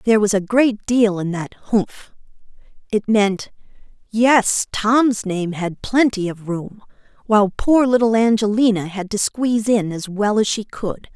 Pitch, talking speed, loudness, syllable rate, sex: 215 Hz, 160 wpm, -18 LUFS, 4.3 syllables/s, female